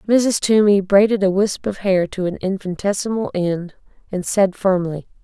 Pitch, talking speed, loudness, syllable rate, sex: 195 Hz, 160 wpm, -18 LUFS, 4.9 syllables/s, female